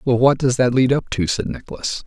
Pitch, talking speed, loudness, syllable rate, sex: 125 Hz, 260 wpm, -19 LUFS, 5.7 syllables/s, male